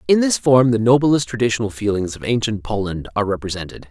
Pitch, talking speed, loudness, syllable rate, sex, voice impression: 115 Hz, 185 wpm, -18 LUFS, 6.3 syllables/s, male, very masculine, very middle-aged, thick, tensed, powerful, bright, slightly hard, slightly muffled, fluent, slightly raspy, cool, very intellectual, refreshing, very sincere, calm, mature, friendly, reassuring, unique, elegant, slightly wild, slightly sweet, lively, kind, slightly light